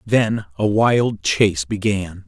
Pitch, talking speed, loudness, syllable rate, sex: 100 Hz, 130 wpm, -19 LUFS, 3.4 syllables/s, male